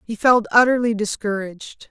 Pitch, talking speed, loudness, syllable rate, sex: 220 Hz, 125 wpm, -18 LUFS, 5.2 syllables/s, female